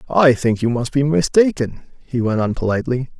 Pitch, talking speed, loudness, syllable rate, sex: 130 Hz, 190 wpm, -18 LUFS, 5.6 syllables/s, male